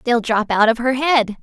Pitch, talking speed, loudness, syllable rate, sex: 240 Hz, 250 wpm, -17 LUFS, 4.7 syllables/s, female